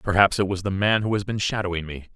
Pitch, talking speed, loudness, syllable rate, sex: 95 Hz, 280 wpm, -23 LUFS, 6.4 syllables/s, male